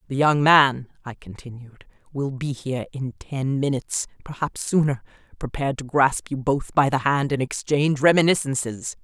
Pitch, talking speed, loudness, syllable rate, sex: 135 Hz, 145 wpm, -22 LUFS, 5.0 syllables/s, female